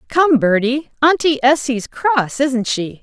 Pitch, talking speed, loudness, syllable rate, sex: 265 Hz, 140 wpm, -16 LUFS, 3.7 syllables/s, female